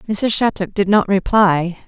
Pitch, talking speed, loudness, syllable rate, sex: 195 Hz, 160 wpm, -16 LUFS, 4.3 syllables/s, female